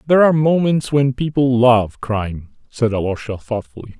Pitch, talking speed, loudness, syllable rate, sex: 125 Hz, 150 wpm, -17 LUFS, 5.3 syllables/s, male